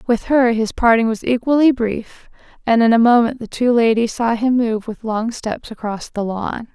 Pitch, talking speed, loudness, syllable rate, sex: 230 Hz, 205 wpm, -17 LUFS, 4.7 syllables/s, female